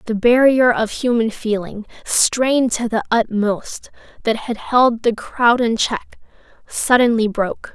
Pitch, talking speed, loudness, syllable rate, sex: 230 Hz, 140 wpm, -17 LUFS, 4.0 syllables/s, female